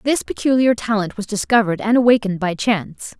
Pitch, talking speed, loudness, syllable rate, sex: 215 Hz, 170 wpm, -18 LUFS, 6.2 syllables/s, female